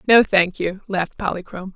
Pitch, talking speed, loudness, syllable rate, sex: 190 Hz, 170 wpm, -20 LUFS, 5.9 syllables/s, female